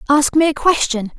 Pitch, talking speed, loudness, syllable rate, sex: 285 Hz, 200 wpm, -15 LUFS, 5.3 syllables/s, female